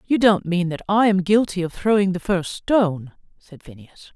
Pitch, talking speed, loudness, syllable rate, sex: 195 Hz, 200 wpm, -20 LUFS, 4.9 syllables/s, female